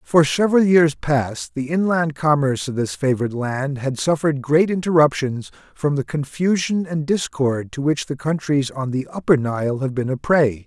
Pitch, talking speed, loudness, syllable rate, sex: 145 Hz, 180 wpm, -20 LUFS, 4.7 syllables/s, male